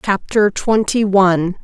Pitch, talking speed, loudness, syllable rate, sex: 200 Hz, 110 wpm, -15 LUFS, 4.0 syllables/s, female